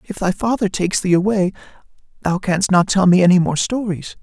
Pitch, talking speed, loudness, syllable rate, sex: 185 Hz, 200 wpm, -17 LUFS, 5.6 syllables/s, male